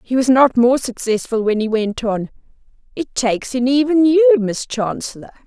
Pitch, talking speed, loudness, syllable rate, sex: 250 Hz, 175 wpm, -16 LUFS, 4.8 syllables/s, female